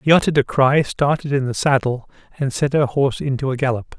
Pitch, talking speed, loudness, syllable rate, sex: 135 Hz, 225 wpm, -19 LUFS, 6.1 syllables/s, male